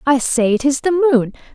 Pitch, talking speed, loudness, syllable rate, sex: 275 Hz, 230 wpm, -15 LUFS, 5.8 syllables/s, female